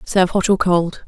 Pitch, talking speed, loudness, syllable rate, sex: 185 Hz, 225 wpm, -17 LUFS, 5.3 syllables/s, female